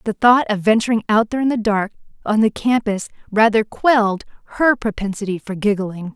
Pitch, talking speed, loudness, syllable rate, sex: 215 Hz, 175 wpm, -18 LUFS, 5.5 syllables/s, female